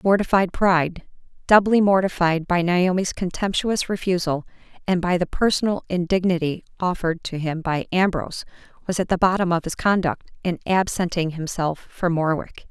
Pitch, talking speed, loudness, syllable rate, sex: 180 Hz, 130 wpm, -21 LUFS, 5.3 syllables/s, female